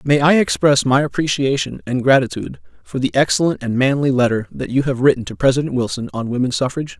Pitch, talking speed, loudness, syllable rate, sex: 135 Hz, 195 wpm, -17 LUFS, 6.2 syllables/s, male